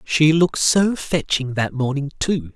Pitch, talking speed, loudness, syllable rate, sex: 145 Hz, 165 wpm, -19 LUFS, 4.2 syllables/s, male